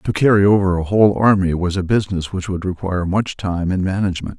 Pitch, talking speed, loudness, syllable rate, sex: 95 Hz, 220 wpm, -17 LUFS, 6.2 syllables/s, male